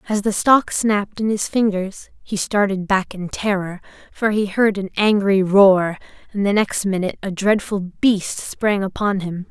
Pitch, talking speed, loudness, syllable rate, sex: 200 Hz, 175 wpm, -19 LUFS, 4.4 syllables/s, female